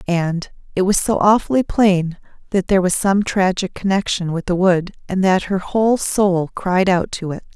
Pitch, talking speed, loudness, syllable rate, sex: 185 Hz, 190 wpm, -18 LUFS, 4.7 syllables/s, female